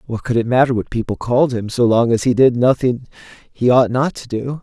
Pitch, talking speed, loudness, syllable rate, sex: 120 Hz, 245 wpm, -16 LUFS, 5.5 syllables/s, male